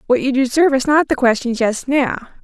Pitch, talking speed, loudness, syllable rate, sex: 260 Hz, 220 wpm, -16 LUFS, 5.6 syllables/s, female